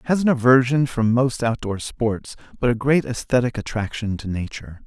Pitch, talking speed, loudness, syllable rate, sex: 120 Hz, 175 wpm, -21 LUFS, 5.2 syllables/s, male